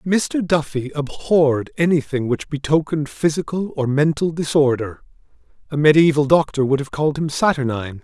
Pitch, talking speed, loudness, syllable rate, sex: 150 Hz, 135 wpm, -19 LUFS, 5.3 syllables/s, male